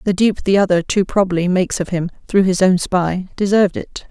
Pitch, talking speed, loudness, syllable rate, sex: 185 Hz, 220 wpm, -16 LUFS, 5.7 syllables/s, female